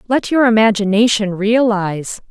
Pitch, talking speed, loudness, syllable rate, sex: 215 Hz, 105 wpm, -14 LUFS, 4.8 syllables/s, female